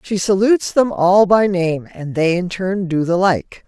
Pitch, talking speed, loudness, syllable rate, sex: 190 Hz, 215 wpm, -16 LUFS, 4.2 syllables/s, female